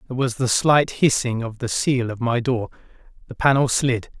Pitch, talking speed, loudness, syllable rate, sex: 125 Hz, 200 wpm, -20 LUFS, 5.1 syllables/s, male